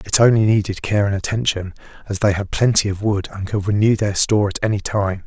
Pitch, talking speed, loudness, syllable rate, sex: 100 Hz, 230 wpm, -18 LUFS, 5.8 syllables/s, male